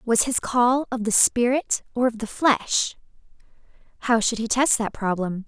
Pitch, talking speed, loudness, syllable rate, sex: 235 Hz, 175 wpm, -22 LUFS, 4.3 syllables/s, female